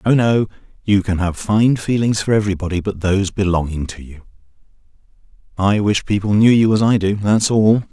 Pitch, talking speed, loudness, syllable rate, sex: 100 Hz, 175 wpm, -17 LUFS, 5.5 syllables/s, male